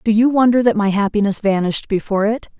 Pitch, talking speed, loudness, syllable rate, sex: 215 Hz, 210 wpm, -16 LUFS, 6.6 syllables/s, female